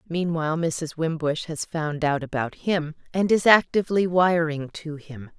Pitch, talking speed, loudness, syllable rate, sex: 160 Hz, 155 wpm, -23 LUFS, 4.5 syllables/s, female